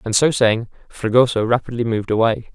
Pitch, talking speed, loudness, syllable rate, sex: 115 Hz, 165 wpm, -18 LUFS, 5.9 syllables/s, male